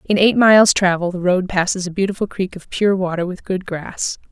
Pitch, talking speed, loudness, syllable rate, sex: 185 Hz, 225 wpm, -17 LUFS, 5.3 syllables/s, female